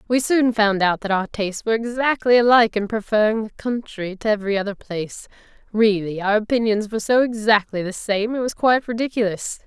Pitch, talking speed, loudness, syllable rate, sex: 215 Hz, 185 wpm, -20 LUFS, 5.9 syllables/s, female